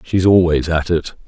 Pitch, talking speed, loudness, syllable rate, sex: 85 Hz, 190 wpm, -15 LUFS, 4.6 syllables/s, male